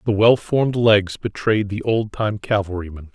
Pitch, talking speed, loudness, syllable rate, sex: 105 Hz, 170 wpm, -19 LUFS, 4.7 syllables/s, male